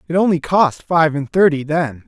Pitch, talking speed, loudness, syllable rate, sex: 160 Hz, 205 wpm, -16 LUFS, 4.8 syllables/s, male